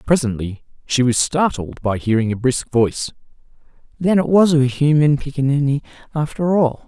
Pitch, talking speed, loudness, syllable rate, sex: 140 Hz, 150 wpm, -18 LUFS, 5.1 syllables/s, male